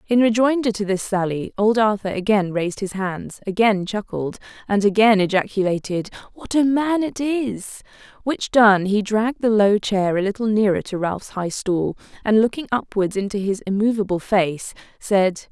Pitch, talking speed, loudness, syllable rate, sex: 210 Hz, 165 wpm, -20 LUFS, 4.8 syllables/s, female